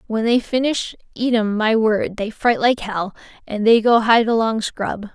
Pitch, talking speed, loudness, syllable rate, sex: 220 Hz, 200 wpm, -18 LUFS, 4.3 syllables/s, female